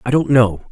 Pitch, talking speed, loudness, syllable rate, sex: 120 Hz, 250 wpm, -14 LUFS, 5.6 syllables/s, male